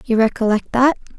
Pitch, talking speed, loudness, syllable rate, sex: 235 Hz, 150 wpm, -17 LUFS, 5.6 syllables/s, female